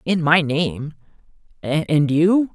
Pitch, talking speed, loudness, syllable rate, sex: 160 Hz, 95 wpm, -18 LUFS, 2.9 syllables/s, male